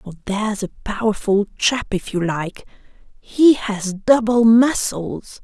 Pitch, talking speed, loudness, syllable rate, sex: 215 Hz, 130 wpm, -18 LUFS, 3.9 syllables/s, female